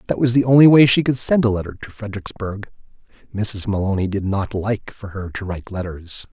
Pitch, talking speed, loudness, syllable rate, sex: 105 Hz, 205 wpm, -18 LUFS, 5.7 syllables/s, male